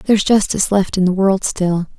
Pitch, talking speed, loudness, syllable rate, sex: 195 Hz, 210 wpm, -16 LUFS, 5.4 syllables/s, female